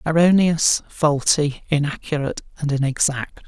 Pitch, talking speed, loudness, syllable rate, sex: 150 Hz, 85 wpm, -20 LUFS, 4.6 syllables/s, male